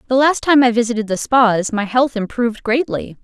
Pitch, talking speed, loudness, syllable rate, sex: 240 Hz, 205 wpm, -16 LUFS, 5.3 syllables/s, female